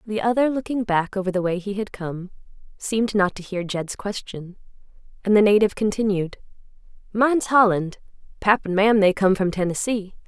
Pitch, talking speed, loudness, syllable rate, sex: 205 Hz, 170 wpm, -21 LUFS, 5.4 syllables/s, female